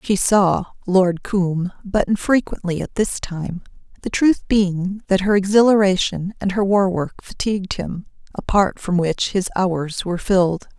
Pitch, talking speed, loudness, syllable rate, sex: 190 Hz, 155 wpm, -19 LUFS, 4.3 syllables/s, female